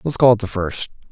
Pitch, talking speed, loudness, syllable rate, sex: 110 Hz, 270 wpm, -18 LUFS, 6.0 syllables/s, male